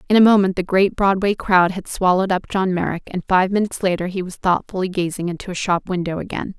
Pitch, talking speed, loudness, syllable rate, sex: 185 Hz, 230 wpm, -19 LUFS, 6.2 syllables/s, female